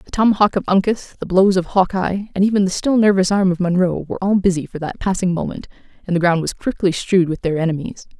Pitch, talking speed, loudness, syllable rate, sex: 185 Hz, 235 wpm, -18 LUFS, 6.2 syllables/s, female